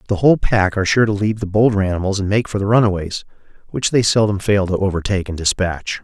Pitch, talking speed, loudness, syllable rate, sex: 100 Hz, 230 wpm, -17 LUFS, 6.7 syllables/s, male